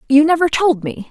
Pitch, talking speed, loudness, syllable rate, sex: 300 Hz, 215 wpm, -15 LUFS, 5.4 syllables/s, female